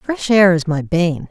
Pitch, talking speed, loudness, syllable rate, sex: 180 Hz, 230 wpm, -15 LUFS, 3.9 syllables/s, female